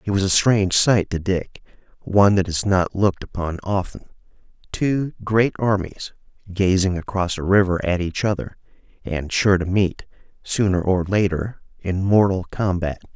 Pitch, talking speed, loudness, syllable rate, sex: 95 Hz, 155 wpm, -20 LUFS, 4.7 syllables/s, male